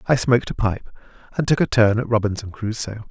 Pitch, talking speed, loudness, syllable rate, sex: 115 Hz, 215 wpm, -20 LUFS, 6.1 syllables/s, male